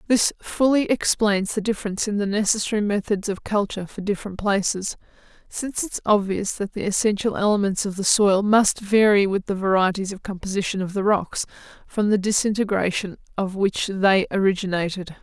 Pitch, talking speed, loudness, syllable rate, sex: 200 Hz, 165 wpm, -22 LUFS, 5.5 syllables/s, female